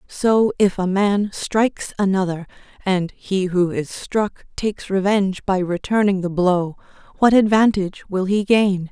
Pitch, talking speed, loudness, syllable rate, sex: 195 Hz, 150 wpm, -19 LUFS, 4.3 syllables/s, female